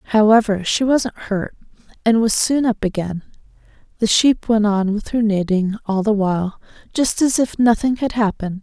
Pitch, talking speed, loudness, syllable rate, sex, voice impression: 215 Hz, 175 wpm, -18 LUFS, 4.8 syllables/s, female, feminine, adult-like, bright, slightly soft, clear, slightly intellectual, friendly, unique, slightly lively, kind, light